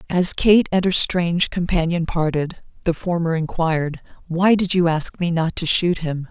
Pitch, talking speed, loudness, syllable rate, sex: 170 Hz, 180 wpm, -19 LUFS, 4.7 syllables/s, female